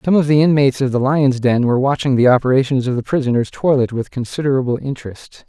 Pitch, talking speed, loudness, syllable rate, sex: 130 Hz, 210 wpm, -16 LUFS, 6.5 syllables/s, male